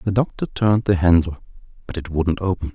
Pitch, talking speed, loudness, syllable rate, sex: 95 Hz, 195 wpm, -20 LUFS, 6.1 syllables/s, male